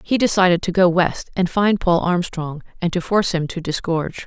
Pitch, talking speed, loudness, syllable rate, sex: 175 Hz, 210 wpm, -19 LUFS, 5.3 syllables/s, female